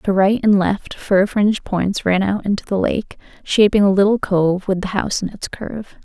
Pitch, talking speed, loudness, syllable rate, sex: 200 Hz, 220 wpm, -18 LUFS, 4.9 syllables/s, female